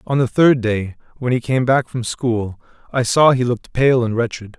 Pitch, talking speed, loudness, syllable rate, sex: 120 Hz, 225 wpm, -17 LUFS, 4.9 syllables/s, male